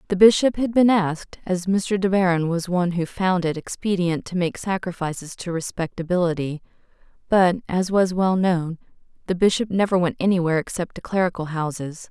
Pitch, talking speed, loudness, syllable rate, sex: 180 Hz, 170 wpm, -22 LUFS, 5.4 syllables/s, female